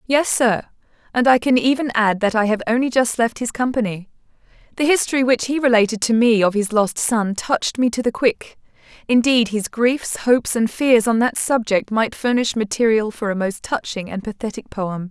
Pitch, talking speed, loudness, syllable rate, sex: 230 Hz, 200 wpm, -18 LUFS, 5.1 syllables/s, female